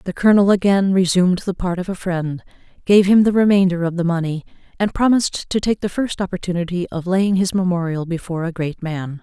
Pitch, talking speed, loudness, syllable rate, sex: 185 Hz, 200 wpm, -18 LUFS, 5.9 syllables/s, female